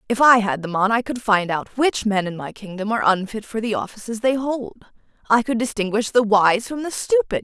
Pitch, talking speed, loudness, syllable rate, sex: 225 Hz, 235 wpm, -20 LUFS, 5.4 syllables/s, female